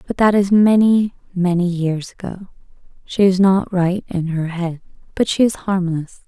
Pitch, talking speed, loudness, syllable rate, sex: 185 Hz, 170 wpm, -17 LUFS, 4.4 syllables/s, female